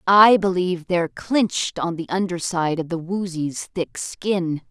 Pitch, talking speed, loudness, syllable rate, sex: 180 Hz, 165 wpm, -21 LUFS, 4.2 syllables/s, female